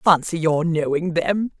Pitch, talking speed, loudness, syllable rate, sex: 165 Hz, 150 wpm, -20 LUFS, 4.1 syllables/s, female